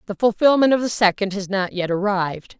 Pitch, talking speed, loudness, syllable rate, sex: 200 Hz, 210 wpm, -19 LUFS, 5.8 syllables/s, female